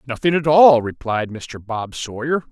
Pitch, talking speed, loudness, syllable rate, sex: 130 Hz, 165 wpm, -18 LUFS, 4.3 syllables/s, male